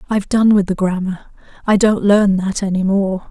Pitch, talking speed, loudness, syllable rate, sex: 195 Hz, 200 wpm, -15 LUFS, 5.1 syllables/s, female